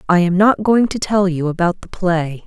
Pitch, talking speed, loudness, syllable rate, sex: 185 Hz, 245 wpm, -16 LUFS, 4.8 syllables/s, female